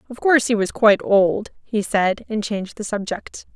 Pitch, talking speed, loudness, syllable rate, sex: 210 Hz, 205 wpm, -20 LUFS, 5.1 syllables/s, female